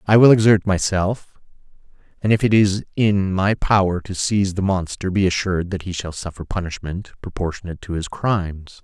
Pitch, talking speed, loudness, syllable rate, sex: 95 Hz, 175 wpm, -20 LUFS, 5.3 syllables/s, male